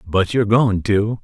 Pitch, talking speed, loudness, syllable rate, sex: 105 Hz, 195 wpm, -17 LUFS, 4.6 syllables/s, male